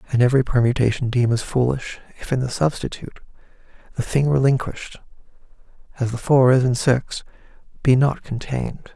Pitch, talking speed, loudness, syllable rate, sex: 130 Hz, 145 wpm, -20 LUFS, 5.8 syllables/s, male